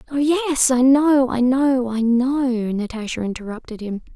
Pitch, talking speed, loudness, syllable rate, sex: 250 Hz, 160 wpm, -19 LUFS, 4.2 syllables/s, female